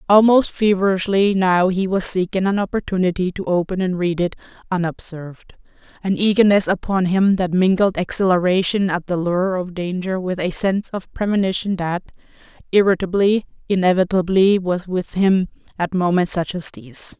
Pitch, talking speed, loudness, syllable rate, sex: 185 Hz, 145 wpm, -19 LUFS, 5.1 syllables/s, female